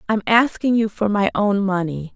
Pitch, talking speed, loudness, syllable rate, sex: 205 Hz, 195 wpm, -19 LUFS, 4.8 syllables/s, female